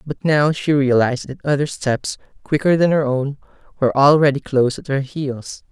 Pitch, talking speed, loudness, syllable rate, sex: 140 Hz, 180 wpm, -18 LUFS, 5.1 syllables/s, male